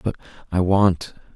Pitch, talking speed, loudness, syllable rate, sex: 95 Hz, 135 wpm, -21 LUFS, 3.9 syllables/s, male